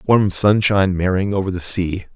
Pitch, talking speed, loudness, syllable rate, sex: 95 Hz, 165 wpm, -18 LUFS, 4.9 syllables/s, male